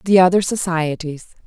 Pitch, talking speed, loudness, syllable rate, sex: 175 Hz, 125 wpm, -17 LUFS, 5.3 syllables/s, female